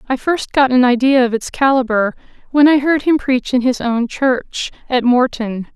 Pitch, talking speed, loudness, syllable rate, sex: 255 Hz, 200 wpm, -15 LUFS, 4.6 syllables/s, female